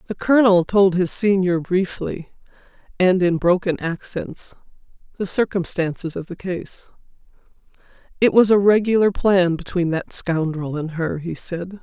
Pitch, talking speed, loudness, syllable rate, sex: 180 Hz, 135 wpm, -19 LUFS, 4.4 syllables/s, female